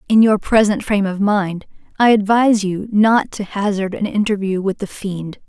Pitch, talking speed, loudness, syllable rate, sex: 205 Hz, 185 wpm, -17 LUFS, 4.9 syllables/s, female